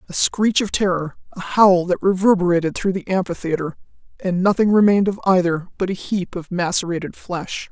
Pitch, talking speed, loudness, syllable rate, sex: 185 Hz, 170 wpm, -19 LUFS, 5.5 syllables/s, female